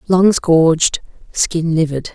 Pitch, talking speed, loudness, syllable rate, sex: 165 Hz, 110 wpm, -15 LUFS, 3.5 syllables/s, female